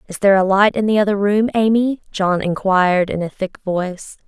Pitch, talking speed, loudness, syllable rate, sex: 200 Hz, 210 wpm, -17 LUFS, 5.4 syllables/s, female